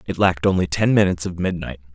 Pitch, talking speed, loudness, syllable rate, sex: 90 Hz, 215 wpm, -20 LUFS, 7.1 syllables/s, male